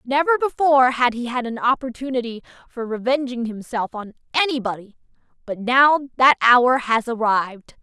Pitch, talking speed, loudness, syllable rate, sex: 245 Hz, 140 wpm, -19 LUFS, 4.9 syllables/s, female